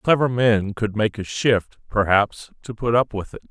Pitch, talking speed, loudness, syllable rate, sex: 110 Hz, 205 wpm, -21 LUFS, 4.4 syllables/s, male